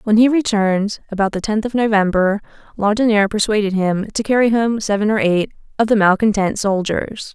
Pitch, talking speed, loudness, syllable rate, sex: 210 Hz, 170 wpm, -17 LUFS, 5.5 syllables/s, female